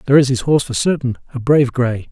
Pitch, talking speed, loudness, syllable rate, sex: 130 Hz, 225 wpm, -16 LUFS, 7.3 syllables/s, male